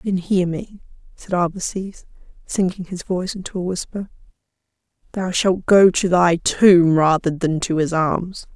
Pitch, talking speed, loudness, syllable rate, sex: 180 Hz, 155 wpm, -19 LUFS, 4.4 syllables/s, female